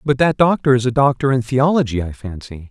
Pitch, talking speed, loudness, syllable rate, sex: 125 Hz, 220 wpm, -16 LUFS, 5.8 syllables/s, male